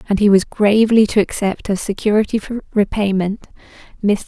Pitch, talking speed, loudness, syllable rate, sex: 205 Hz, 140 wpm, -16 LUFS, 5.5 syllables/s, female